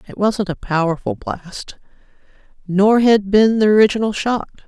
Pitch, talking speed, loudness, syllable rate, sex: 200 Hz, 140 wpm, -16 LUFS, 4.6 syllables/s, female